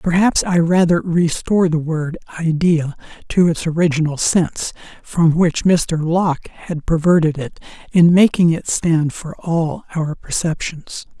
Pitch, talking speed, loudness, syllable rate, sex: 165 Hz, 140 wpm, -17 LUFS, 4.2 syllables/s, male